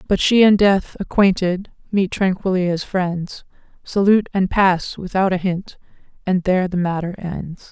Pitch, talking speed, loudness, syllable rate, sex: 185 Hz, 155 wpm, -18 LUFS, 4.6 syllables/s, female